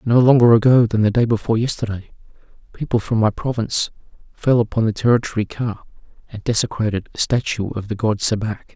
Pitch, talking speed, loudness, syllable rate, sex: 110 Hz, 170 wpm, -18 LUFS, 6.1 syllables/s, male